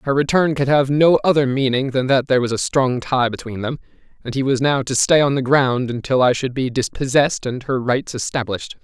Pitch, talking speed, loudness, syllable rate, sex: 130 Hz, 230 wpm, -18 LUFS, 5.6 syllables/s, male